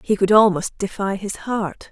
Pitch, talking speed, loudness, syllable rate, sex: 200 Hz, 190 wpm, -19 LUFS, 4.4 syllables/s, female